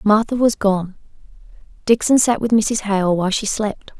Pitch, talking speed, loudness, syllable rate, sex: 210 Hz, 165 wpm, -17 LUFS, 4.7 syllables/s, female